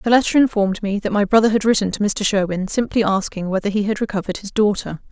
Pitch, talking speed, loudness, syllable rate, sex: 205 Hz, 235 wpm, -19 LUFS, 6.6 syllables/s, female